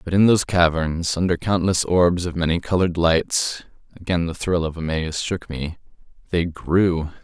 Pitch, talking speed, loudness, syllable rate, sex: 85 Hz, 150 wpm, -21 LUFS, 4.9 syllables/s, male